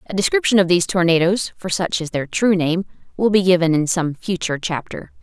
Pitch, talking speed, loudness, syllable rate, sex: 180 Hz, 185 wpm, -18 LUFS, 5.9 syllables/s, female